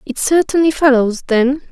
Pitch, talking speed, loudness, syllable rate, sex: 275 Hz, 140 wpm, -14 LUFS, 4.8 syllables/s, female